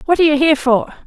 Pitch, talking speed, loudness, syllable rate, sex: 295 Hz, 285 wpm, -14 LUFS, 8.4 syllables/s, female